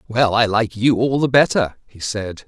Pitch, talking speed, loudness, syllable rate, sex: 115 Hz, 220 wpm, -18 LUFS, 4.5 syllables/s, male